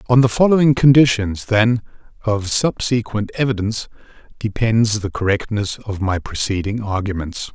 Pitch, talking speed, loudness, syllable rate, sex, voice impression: 110 Hz, 120 wpm, -18 LUFS, 4.9 syllables/s, male, masculine, adult-like, tensed, powerful, slightly hard, slightly muffled, halting, cool, intellectual, calm, mature, reassuring, wild, lively, slightly strict